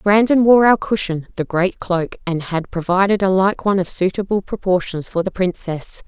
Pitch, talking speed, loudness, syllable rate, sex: 190 Hz, 190 wpm, -18 LUFS, 5.0 syllables/s, female